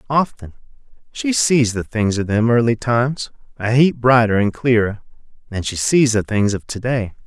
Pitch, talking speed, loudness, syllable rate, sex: 115 Hz, 175 wpm, -17 LUFS, 4.8 syllables/s, male